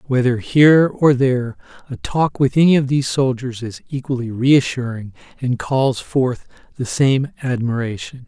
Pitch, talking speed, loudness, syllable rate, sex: 130 Hz, 145 wpm, -17 LUFS, 4.7 syllables/s, male